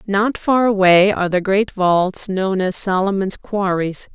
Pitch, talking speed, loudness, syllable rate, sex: 195 Hz, 160 wpm, -17 LUFS, 4.0 syllables/s, female